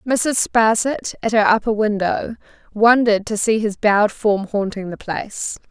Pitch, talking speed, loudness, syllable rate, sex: 215 Hz, 160 wpm, -18 LUFS, 4.6 syllables/s, female